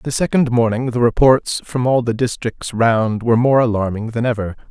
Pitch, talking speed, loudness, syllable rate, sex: 120 Hz, 190 wpm, -17 LUFS, 5.1 syllables/s, male